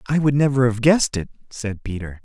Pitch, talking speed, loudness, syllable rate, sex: 125 Hz, 215 wpm, -20 LUFS, 5.8 syllables/s, male